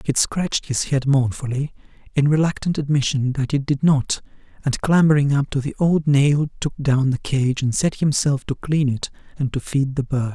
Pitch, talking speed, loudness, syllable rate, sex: 140 Hz, 195 wpm, -20 LUFS, 4.9 syllables/s, male